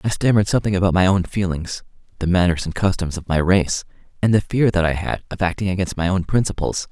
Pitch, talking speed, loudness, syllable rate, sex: 95 Hz, 210 wpm, -20 LUFS, 6.3 syllables/s, male